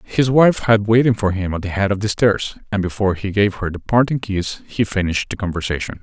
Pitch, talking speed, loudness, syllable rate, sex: 100 Hz, 240 wpm, -18 LUFS, 5.8 syllables/s, male